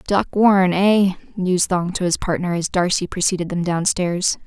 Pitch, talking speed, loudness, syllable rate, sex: 180 Hz, 175 wpm, -19 LUFS, 5.0 syllables/s, female